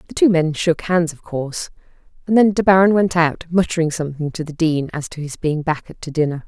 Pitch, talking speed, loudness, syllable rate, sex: 165 Hz, 230 wpm, -18 LUFS, 5.7 syllables/s, female